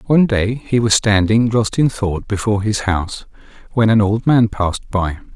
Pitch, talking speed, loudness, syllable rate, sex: 110 Hz, 190 wpm, -16 LUFS, 5.0 syllables/s, male